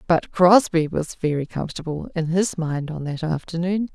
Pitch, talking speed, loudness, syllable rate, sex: 165 Hz, 165 wpm, -22 LUFS, 4.9 syllables/s, female